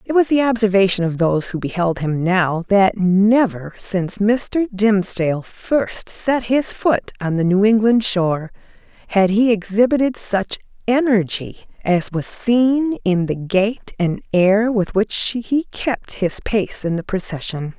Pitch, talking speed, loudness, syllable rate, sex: 205 Hz, 155 wpm, -18 LUFS, 4.1 syllables/s, female